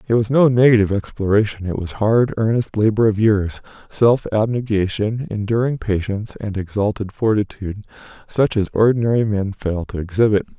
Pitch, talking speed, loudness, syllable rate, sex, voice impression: 105 Hz, 145 wpm, -18 LUFS, 5.3 syllables/s, male, very masculine, very adult-like, old, very thick, relaxed, weak, dark, soft, muffled, fluent, slightly raspy, slightly cool, intellectual, sincere, calm, slightly friendly, slightly reassuring, unique, slightly elegant, wild, slightly sweet, slightly lively, very kind, very modest